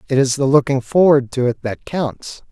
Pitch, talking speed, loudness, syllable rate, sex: 135 Hz, 215 wpm, -17 LUFS, 4.9 syllables/s, male